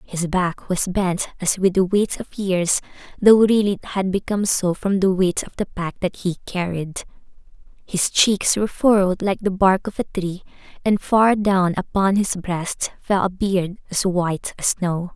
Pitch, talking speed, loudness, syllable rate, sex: 190 Hz, 190 wpm, -20 LUFS, 4.6 syllables/s, female